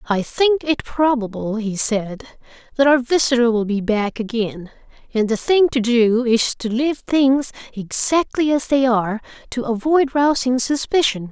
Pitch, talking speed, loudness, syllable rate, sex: 245 Hz, 160 wpm, -18 LUFS, 4.4 syllables/s, female